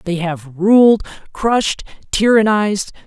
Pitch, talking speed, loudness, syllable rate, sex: 200 Hz, 100 wpm, -15 LUFS, 4.0 syllables/s, male